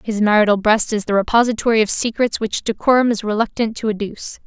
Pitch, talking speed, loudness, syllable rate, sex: 215 Hz, 190 wpm, -17 LUFS, 6.6 syllables/s, female